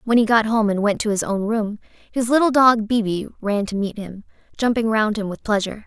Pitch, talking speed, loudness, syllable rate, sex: 215 Hz, 235 wpm, -20 LUFS, 5.4 syllables/s, female